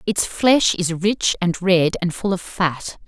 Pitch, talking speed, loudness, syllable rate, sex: 180 Hz, 195 wpm, -19 LUFS, 3.6 syllables/s, female